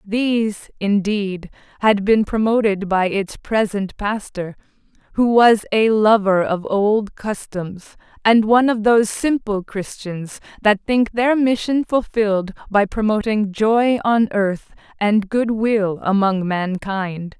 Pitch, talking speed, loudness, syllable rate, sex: 210 Hz, 130 wpm, -18 LUFS, 3.7 syllables/s, female